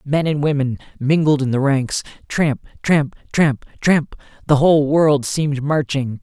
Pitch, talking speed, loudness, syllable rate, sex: 145 Hz, 155 wpm, -18 LUFS, 4.3 syllables/s, male